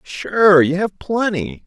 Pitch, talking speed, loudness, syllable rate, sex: 175 Hz, 110 wpm, -16 LUFS, 3.2 syllables/s, male